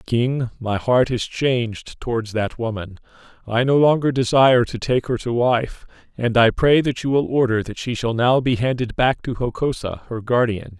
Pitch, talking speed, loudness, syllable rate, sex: 120 Hz, 195 wpm, -20 LUFS, 4.7 syllables/s, male